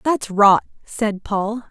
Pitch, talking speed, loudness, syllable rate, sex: 215 Hz, 140 wpm, -18 LUFS, 3.0 syllables/s, female